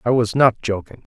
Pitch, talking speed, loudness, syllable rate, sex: 115 Hz, 200 wpm, -18 LUFS, 5.5 syllables/s, male